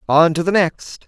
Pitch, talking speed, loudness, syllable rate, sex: 170 Hz, 225 wpm, -16 LUFS, 4.4 syllables/s, female